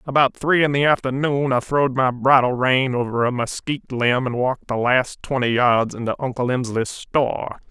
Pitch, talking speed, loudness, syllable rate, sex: 130 Hz, 185 wpm, -20 LUFS, 5.2 syllables/s, male